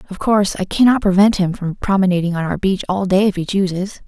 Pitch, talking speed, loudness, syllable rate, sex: 190 Hz, 235 wpm, -16 LUFS, 6.1 syllables/s, female